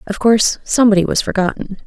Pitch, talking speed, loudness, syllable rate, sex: 205 Hz, 160 wpm, -15 LUFS, 6.8 syllables/s, female